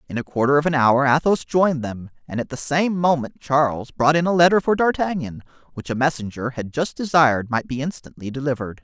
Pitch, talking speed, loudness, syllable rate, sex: 145 Hz, 210 wpm, -20 LUFS, 5.9 syllables/s, male